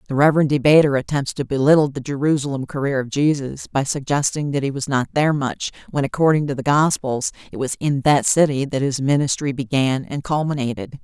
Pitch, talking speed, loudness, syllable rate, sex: 140 Hz, 190 wpm, -19 LUFS, 5.8 syllables/s, female